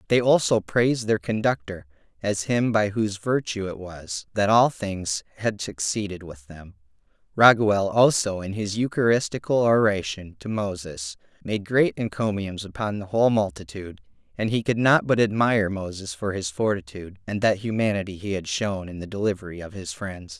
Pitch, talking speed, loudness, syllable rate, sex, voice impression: 100 Hz, 165 wpm, -24 LUFS, 5.1 syllables/s, male, very masculine, adult-like, slightly middle-aged, very thick, slightly relaxed, slightly weak, bright, hard, clear, cool, intellectual, refreshing, slightly sincere, slightly calm, mature, slightly friendly, slightly reassuring, unique, slightly wild, sweet, slightly kind, slightly modest